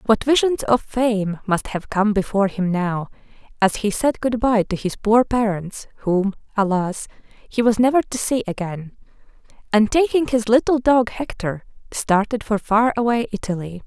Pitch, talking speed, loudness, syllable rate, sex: 215 Hz, 165 wpm, -20 LUFS, 4.6 syllables/s, female